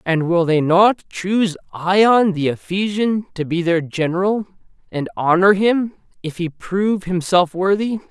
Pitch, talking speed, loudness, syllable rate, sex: 185 Hz, 150 wpm, -18 LUFS, 4.2 syllables/s, male